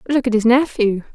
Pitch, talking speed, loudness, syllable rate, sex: 235 Hz, 210 wpm, -17 LUFS, 5.8 syllables/s, female